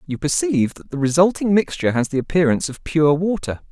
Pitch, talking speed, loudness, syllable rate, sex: 150 Hz, 195 wpm, -19 LUFS, 6.3 syllables/s, male